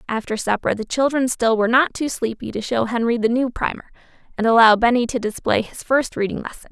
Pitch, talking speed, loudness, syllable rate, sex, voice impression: 235 Hz, 215 wpm, -19 LUFS, 5.9 syllables/s, female, feminine, adult-like, tensed, powerful, slightly bright, slightly soft, clear, slightly intellectual, friendly, lively, slightly sharp